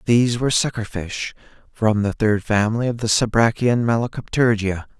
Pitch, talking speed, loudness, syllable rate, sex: 110 Hz, 130 wpm, -20 LUFS, 5.7 syllables/s, male